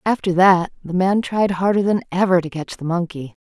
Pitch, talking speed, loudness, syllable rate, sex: 185 Hz, 210 wpm, -19 LUFS, 5.3 syllables/s, female